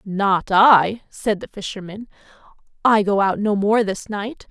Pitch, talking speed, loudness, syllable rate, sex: 205 Hz, 160 wpm, -19 LUFS, 3.9 syllables/s, female